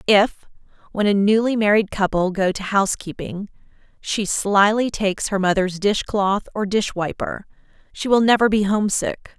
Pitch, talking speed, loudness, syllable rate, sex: 205 Hz, 155 wpm, -20 LUFS, 4.7 syllables/s, female